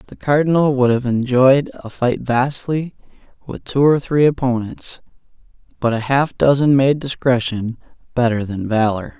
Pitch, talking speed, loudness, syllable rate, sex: 130 Hz, 145 wpm, -17 LUFS, 4.5 syllables/s, male